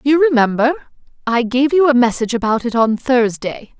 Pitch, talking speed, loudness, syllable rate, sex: 250 Hz, 175 wpm, -15 LUFS, 5.1 syllables/s, female